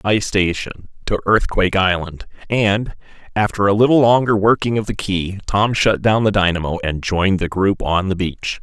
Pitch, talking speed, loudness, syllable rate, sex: 100 Hz, 165 wpm, -17 LUFS, 4.9 syllables/s, male